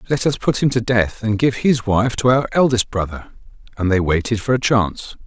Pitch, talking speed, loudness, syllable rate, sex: 115 Hz, 230 wpm, -18 LUFS, 5.3 syllables/s, male